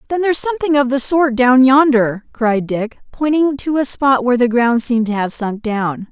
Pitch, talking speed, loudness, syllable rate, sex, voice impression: 255 Hz, 215 wpm, -15 LUFS, 5.1 syllables/s, female, feminine, adult-like, tensed, powerful, bright, clear, friendly, lively, intense, sharp